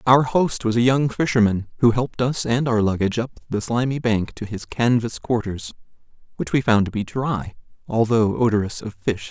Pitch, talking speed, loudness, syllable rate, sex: 115 Hz, 195 wpm, -21 LUFS, 5.2 syllables/s, male